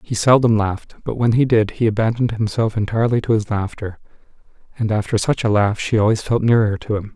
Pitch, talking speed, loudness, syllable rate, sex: 110 Hz, 210 wpm, -18 LUFS, 6.2 syllables/s, male